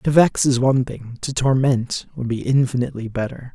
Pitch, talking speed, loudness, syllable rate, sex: 130 Hz, 185 wpm, -20 LUFS, 5.3 syllables/s, male